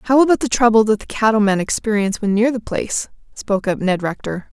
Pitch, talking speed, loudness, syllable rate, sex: 220 Hz, 220 wpm, -17 LUFS, 6.1 syllables/s, female